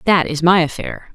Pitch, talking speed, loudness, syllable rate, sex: 170 Hz, 210 wpm, -15 LUFS, 5.0 syllables/s, female